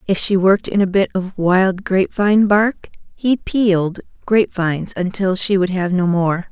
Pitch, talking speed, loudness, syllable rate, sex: 190 Hz, 195 wpm, -17 LUFS, 4.6 syllables/s, female